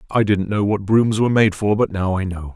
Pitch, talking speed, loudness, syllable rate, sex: 100 Hz, 280 wpm, -18 LUFS, 6.0 syllables/s, male